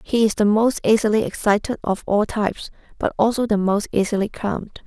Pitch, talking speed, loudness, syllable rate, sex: 210 Hz, 185 wpm, -20 LUFS, 5.6 syllables/s, female